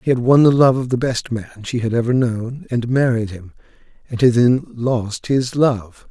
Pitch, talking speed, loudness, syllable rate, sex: 120 Hz, 215 wpm, -17 LUFS, 4.6 syllables/s, male